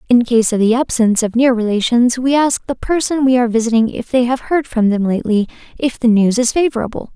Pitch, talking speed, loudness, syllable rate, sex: 240 Hz, 225 wpm, -15 LUFS, 6.0 syllables/s, female